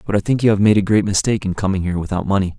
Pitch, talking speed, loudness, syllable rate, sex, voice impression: 100 Hz, 325 wpm, -17 LUFS, 8.2 syllables/s, male, masculine, slightly young, slightly adult-like, very thick, relaxed, slightly weak, slightly dark, soft, slightly muffled, very fluent, very cool, very intellectual, slightly refreshing, very sincere, calm, mature, very friendly, very reassuring, unique, elegant, slightly wild, sweet, kind, slightly modest